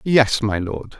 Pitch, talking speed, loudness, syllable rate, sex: 110 Hz, 180 wpm, -19 LUFS, 3.4 syllables/s, male